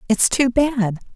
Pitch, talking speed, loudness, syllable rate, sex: 240 Hz, 155 wpm, -18 LUFS, 3.4 syllables/s, female